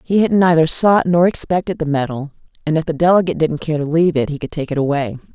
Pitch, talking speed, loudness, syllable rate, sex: 160 Hz, 245 wpm, -16 LUFS, 6.5 syllables/s, female